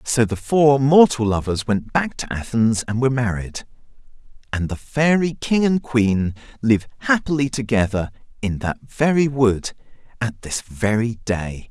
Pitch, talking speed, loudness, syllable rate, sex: 120 Hz, 150 wpm, -20 LUFS, 4.3 syllables/s, male